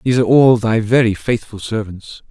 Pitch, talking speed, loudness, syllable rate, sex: 115 Hz, 180 wpm, -15 LUFS, 5.6 syllables/s, male